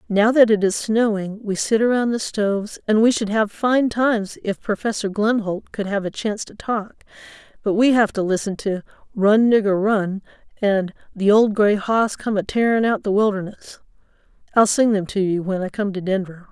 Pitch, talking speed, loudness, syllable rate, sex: 210 Hz, 200 wpm, -20 LUFS, 5.0 syllables/s, female